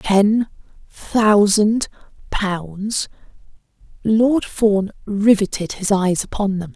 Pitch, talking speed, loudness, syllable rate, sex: 205 Hz, 70 wpm, -18 LUFS, 2.9 syllables/s, female